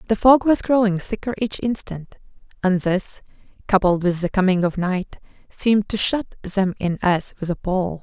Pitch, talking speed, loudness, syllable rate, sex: 195 Hz, 180 wpm, -20 LUFS, 4.6 syllables/s, female